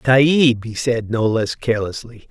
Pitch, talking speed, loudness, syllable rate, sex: 120 Hz, 155 wpm, -18 LUFS, 4.3 syllables/s, male